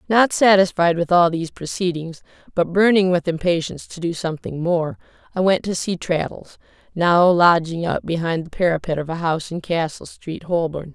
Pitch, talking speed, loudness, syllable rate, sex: 170 Hz, 175 wpm, -19 LUFS, 5.2 syllables/s, female